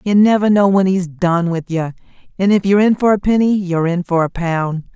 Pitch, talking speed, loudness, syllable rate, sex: 185 Hz, 240 wpm, -15 LUFS, 5.5 syllables/s, female